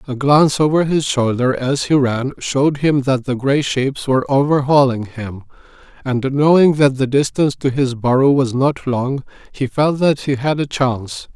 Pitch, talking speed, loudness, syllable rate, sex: 135 Hz, 185 wpm, -16 LUFS, 4.9 syllables/s, male